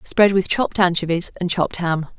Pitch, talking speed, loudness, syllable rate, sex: 180 Hz, 190 wpm, -19 LUFS, 5.5 syllables/s, female